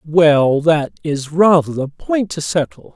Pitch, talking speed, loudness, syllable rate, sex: 160 Hz, 165 wpm, -16 LUFS, 3.7 syllables/s, male